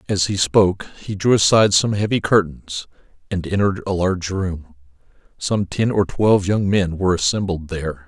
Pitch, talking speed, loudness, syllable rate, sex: 95 Hz, 170 wpm, -19 LUFS, 5.4 syllables/s, male